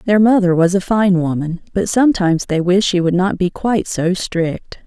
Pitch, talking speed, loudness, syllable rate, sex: 185 Hz, 210 wpm, -16 LUFS, 5.1 syllables/s, female